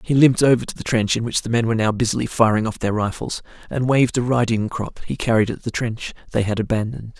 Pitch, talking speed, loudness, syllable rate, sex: 115 Hz, 250 wpm, -20 LUFS, 6.6 syllables/s, male